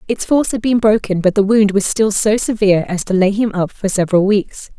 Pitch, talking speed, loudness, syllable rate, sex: 205 Hz, 250 wpm, -15 LUFS, 5.7 syllables/s, female